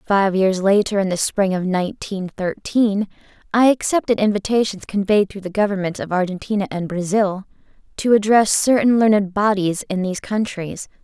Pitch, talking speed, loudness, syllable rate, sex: 200 Hz, 150 wpm, -19 LUFS, 5.2 syllables/s, female